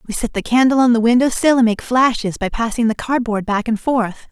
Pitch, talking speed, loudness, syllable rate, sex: 235 Hz, 250 wpm, -16 LUFS, 5.6 syllables/s, female